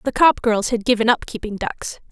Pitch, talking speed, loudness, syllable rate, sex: 230 Hz, 225 wpm, -19 LUFS, 5.2 syllables/s, female